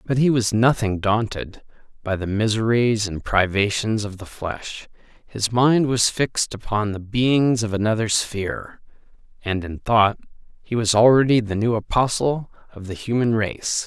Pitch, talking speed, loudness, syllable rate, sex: 110 Hz, 155 wpm, -21 LUFS, 4.4 syllables/s, male